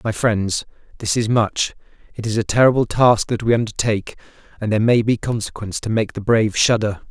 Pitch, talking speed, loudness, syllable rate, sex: 110 Hz, 195 wpm, -19 LUFS, 5.9 syllables/s, male